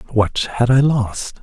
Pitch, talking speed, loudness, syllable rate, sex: 120 Hz, 170 wpm, -17 LUFS, 4.0 syllables/s, male